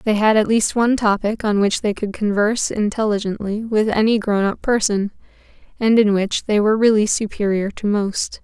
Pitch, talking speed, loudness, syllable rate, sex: 210 Hz, 185 wpm, -18 LUFS, 5.2 syllables/s, female